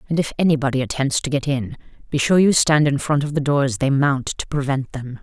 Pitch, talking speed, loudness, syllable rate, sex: 140 Hz, 250 wpm, -19 LUFS, 5.8 syllables/s, female